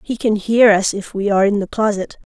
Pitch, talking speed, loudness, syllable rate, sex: 205 Hz, 255 wpm, -16 LUFS, 5.7 syllables/s, female